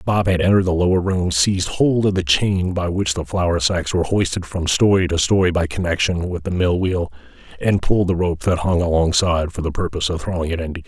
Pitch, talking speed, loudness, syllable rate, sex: 90 Hz, 235 wpm, -19 LUFS, 6.0 syllables/s, male